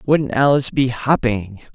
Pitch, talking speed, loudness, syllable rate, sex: 125 Hz, 135 wpm, -18 LUFS, 4.6 syllables/s, male